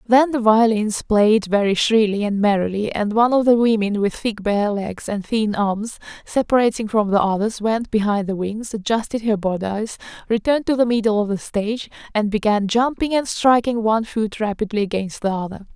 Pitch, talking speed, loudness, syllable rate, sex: 215 Hz, 185 wpm, -19 LUFS, 5.2 syllables/s, female